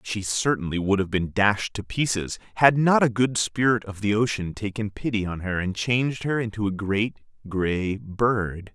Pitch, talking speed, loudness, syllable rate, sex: 105 Hz, 190 wpm, -24 LUFS, 4.5 syllables/s, male